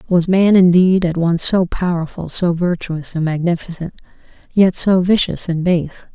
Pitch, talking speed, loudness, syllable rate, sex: 175 Hz, 155 wpm, -16 LUFS, 4.5 syllables/s, female